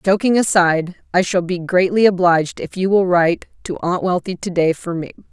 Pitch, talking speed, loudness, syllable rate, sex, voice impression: 180 Hz, 205 wpm, -17 LUFS, 5.5 syllables/s, female, feminine, slightly gender-neutral, very adult-like, middle-aged, thin, very tensed, slightly powerful, slightly dark, very hard, very clear, fluent, cool, very intellectual, very sincere, calm, friendly, reassuring, unique, elegant, slightly wild, sweet, slightly lively, strict, sharp